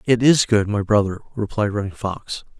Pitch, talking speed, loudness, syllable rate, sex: 110 Hz, 185 wpm, -20 LUFS, 4.9 syllables/s, male